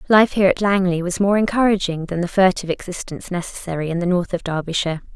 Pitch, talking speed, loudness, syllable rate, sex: 180 Hz, 200 wpm, -19 LUFS, 6.8 syllables/s, female